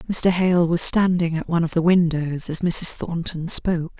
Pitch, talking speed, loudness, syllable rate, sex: 170 Hz, 195 wpm, -20 LUFS, 4.8 syllables/s, female